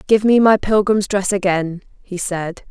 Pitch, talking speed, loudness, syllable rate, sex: 195 Hz, 175 wpm, -16 LUFS, 4.3 syllables/s, female